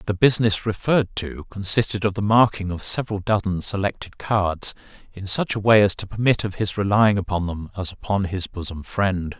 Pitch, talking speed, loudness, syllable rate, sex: 100 Hz, 190 wpm, -22 LUFS, 5.4 syllables/s, male